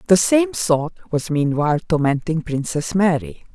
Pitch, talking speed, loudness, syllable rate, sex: 165 Hz, 135 wpm, -19 LUFS, 4.5 syllables/s, female